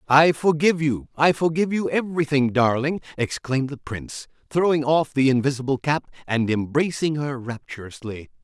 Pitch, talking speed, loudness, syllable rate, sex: 140 Hz, 140 wpm, -22 LUFS, 5.4 syllables/s, male